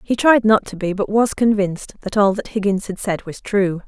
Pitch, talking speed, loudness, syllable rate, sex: 200 Hz, 250 wpm, -18 LUFS, 5.2 syllables/s, female